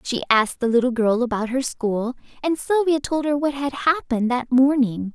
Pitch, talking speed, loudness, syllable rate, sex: 260 Hz, 200 wpm, -21 LUFS, 5.1 syllables/s, female